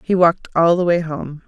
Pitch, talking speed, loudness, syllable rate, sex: 170 Hz, 245 wpm, -17 LUFS, 5.5 syllables/s, female